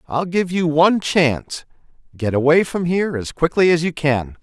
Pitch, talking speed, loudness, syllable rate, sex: 160 Hz, 175 wpm, -18 LUFS, 5.1 syllables/s, male